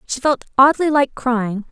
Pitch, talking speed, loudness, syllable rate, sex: 260 Hz, 175 wpm, -17 LUFS, 4.4 syllables/s, female